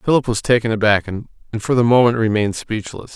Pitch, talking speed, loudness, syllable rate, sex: 115 Hz, 190 wpm, -17 LUFS, 6.1 syllables/s, male